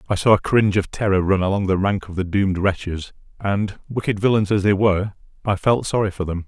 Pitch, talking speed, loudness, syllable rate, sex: 100 Hz, 230 wpm, -20 LUFS, 6.0 syllables/s, male